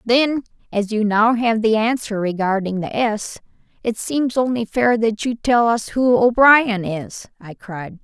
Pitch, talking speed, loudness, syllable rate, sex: 225 Hz, 170 wpm, -18 LUFS, 4.0 syllables/s, female